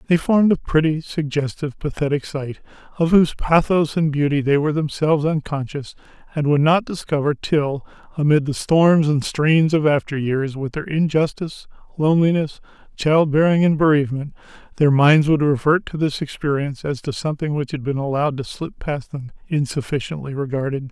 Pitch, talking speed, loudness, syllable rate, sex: 150 Hz, 165 wpm, -19 LUFS, 5.5 syllables/s, male